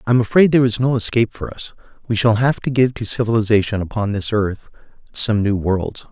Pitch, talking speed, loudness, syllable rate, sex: 110 Hz, 195 wpm, -18 LUFS, 5.8 syllables/s, male